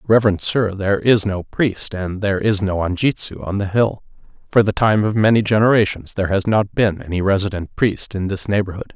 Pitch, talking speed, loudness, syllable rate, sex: 100 Hz, 200 wpm, -18 LUFS, 5.6 syllables/s, male